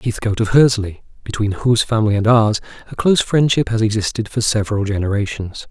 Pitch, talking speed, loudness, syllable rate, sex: 110 Hz, 170 wpm, -17 LUFS, 6.2 syllables/s, male